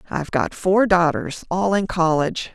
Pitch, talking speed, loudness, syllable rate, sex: 175 Hz, 140 wpm, -20 LUFS, 4.8 syllables/s, female